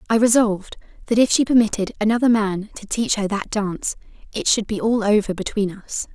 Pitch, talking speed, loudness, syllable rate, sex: 215 Hz, 195 wpm, -20 LUFS, 5.7 syllables/s, female